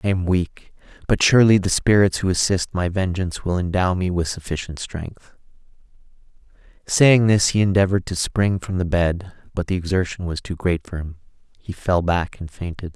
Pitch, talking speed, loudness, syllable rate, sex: 90 Hz, 180 wpm, -20 LUFS, 5.2 syllables/s, male